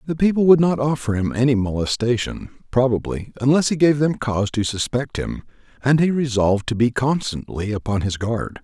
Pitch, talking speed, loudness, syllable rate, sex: 125 Hz, 180 wpm, -20 LUFS, 5.4 syllables/s, male